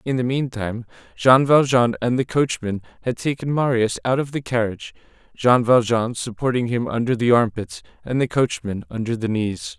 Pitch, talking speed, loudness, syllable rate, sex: 120 Hz, 170 wpm, -20 LUFS, 5.1 syllables/s, male